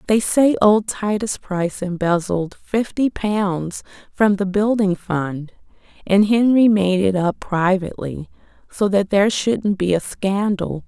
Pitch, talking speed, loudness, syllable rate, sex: 195 Hz, 140 wpm, -19 LUFS, 4.0 syllables/s, female